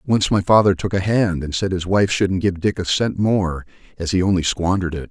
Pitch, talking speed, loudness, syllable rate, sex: 95 Hz, 245 wpm, -19 LUFS, 5.4 syllables/s, male